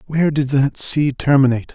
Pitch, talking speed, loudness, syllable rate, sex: 140 Hz, 170 wpm, -17 LUFS, 5.7 syllables/s, male